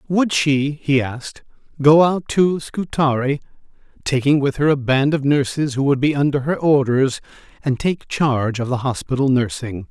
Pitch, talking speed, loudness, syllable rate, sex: 140 Hz, 170 wpm, -18 LUFS, 4.7 syllables/s, male